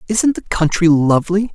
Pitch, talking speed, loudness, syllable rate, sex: 180 Hz, 155 wpm, -15 LUFS, 5.1 syllables/s, male